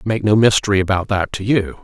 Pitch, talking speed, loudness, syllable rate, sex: 100 Hz, 260 wpm, -16 LUFS, 6.5 syllables/s, male